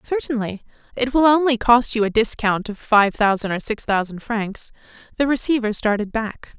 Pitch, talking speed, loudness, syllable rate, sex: 225 Hz, 175 wpm, -20 LUFS, 5.0 syllables/s, female